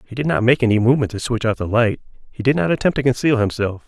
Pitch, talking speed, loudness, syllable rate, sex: 120 Hz, 280 wpm, -18 LUFS, 6.9 syllables/s, male